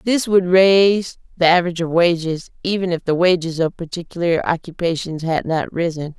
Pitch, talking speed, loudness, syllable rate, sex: 175 Hz, 165 wpm, -18 LUFS, 5.4 syllables/s, female